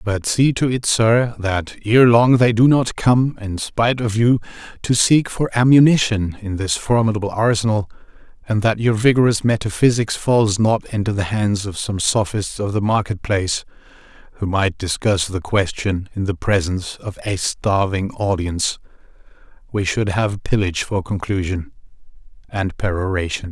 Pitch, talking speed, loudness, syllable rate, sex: 105 Hz, 155 wpm, -18 LUFS, 4.7 syllables/s, male